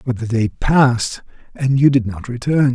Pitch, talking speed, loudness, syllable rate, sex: 125 Hz, 195 wpm, -17 LUFS, 4.8 syllables/s, male